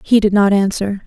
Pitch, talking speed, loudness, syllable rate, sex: 200 Hz, 225 wpm, -14 LUFS, 5.2 syllables/s, female